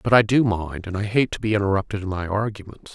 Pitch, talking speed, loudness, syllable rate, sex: 100 Hz, 265 wpm, -22 LUFS, 6.3 syllables/s, male